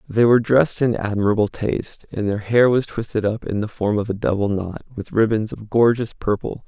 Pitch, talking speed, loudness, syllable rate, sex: 110 Hz, 215 wpm, -20 LUFS, 5.5 syllables/s, male